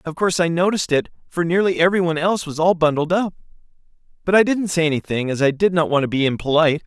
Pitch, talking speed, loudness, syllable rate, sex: 165 Hz, 225 wpm, -19 LUFS, 7.1 syllables/s, male